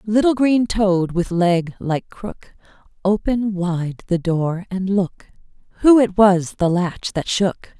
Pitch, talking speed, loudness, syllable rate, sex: 190 Hz, 155 wpm, -19 LUFS, 3.4 syllables/s, female